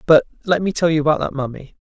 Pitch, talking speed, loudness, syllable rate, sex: 155 Hz, 265 wpm, -18 LUFS, 6.8 syllables/s, male